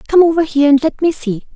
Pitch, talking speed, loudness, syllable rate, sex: 295 Hz, 270 wpm, -14 LUFS, 6.8 syllables/s, female